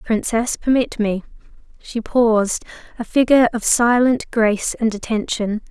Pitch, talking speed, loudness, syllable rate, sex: 230 Hz, 125 wpm, -18 LUFS, 4.6 syllables/s, female